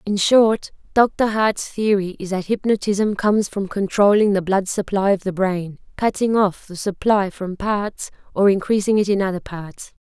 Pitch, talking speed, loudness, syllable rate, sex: 200 Hz, 175 wpm, -19 LUFS, 4.5 syllables/s, female